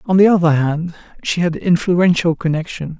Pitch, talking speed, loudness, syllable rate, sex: 170 Hz, 160 wpm, -16 LUFS, 5.0 syllables/s, male